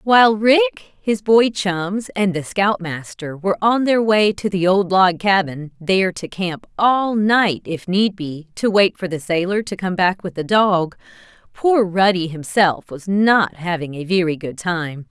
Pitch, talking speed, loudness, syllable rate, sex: 190 Hz, 185 wpm, -18 LUFS, 4.1 syllables/s, female